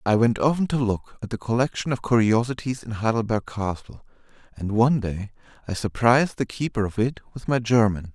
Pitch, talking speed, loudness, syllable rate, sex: 115 Hz, 185 wpm, -23 LUFS, 5.6 syllables/s, male